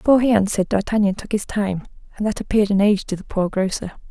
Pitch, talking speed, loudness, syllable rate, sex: 205 Hz, 235 wpm, -20 LUFS, 7.2 syllables/s, female